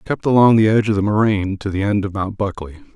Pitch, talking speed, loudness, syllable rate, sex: 100 Hz, 245 wpm, -17 LUFS, 6.4 syllables/s, male